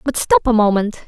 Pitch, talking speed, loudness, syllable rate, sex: 235 Hz, 225 wpm, -15 LUFS, 5.4 syllables/s, female